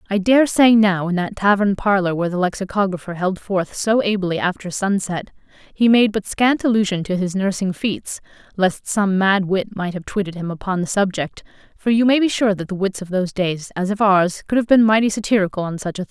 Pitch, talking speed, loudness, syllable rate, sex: 195 Hz, 225 wpm, -19 LUFS, 5.6 syllables/s, female